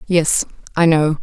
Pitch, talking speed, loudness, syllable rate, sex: 160 Hz, 145 wpm, -16 LUFS, 4.0 syllables/s, female